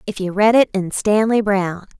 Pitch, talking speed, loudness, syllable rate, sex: 200 Hz, 210 wpm, -17 LUFS, 5.2 syllables/s, female